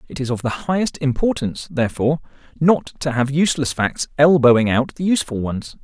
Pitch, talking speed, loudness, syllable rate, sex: 140 Hz, 175 wpm, -19 LUFS, 5.9 syllables/s, male